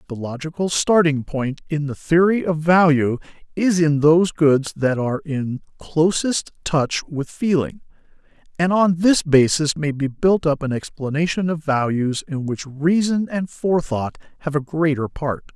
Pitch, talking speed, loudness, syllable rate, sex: 155 Hz, 160 wpm, -20 LUFS, 4.4 syllables/s, male